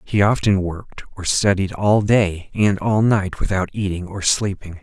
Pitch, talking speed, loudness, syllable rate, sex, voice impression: 100 Hz, 175 wpm, -19 LUFS, 4.4 syllables/s, male, masculine, adult-like, tensed, powerful, bright, slightly soft, fluent, intellectual, calm, mature, friendly, reassuring, wild, slightly lively, slightly kind